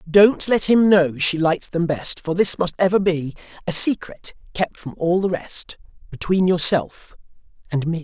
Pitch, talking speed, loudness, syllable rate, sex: 175 Hz, 180 wpm, -19 LUFS, 4.5 syllables/s, male